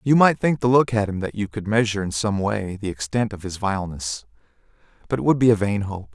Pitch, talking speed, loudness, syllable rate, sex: 105 Hz, 255 wpm, -22 LUFS, 6.0 syllables/s, male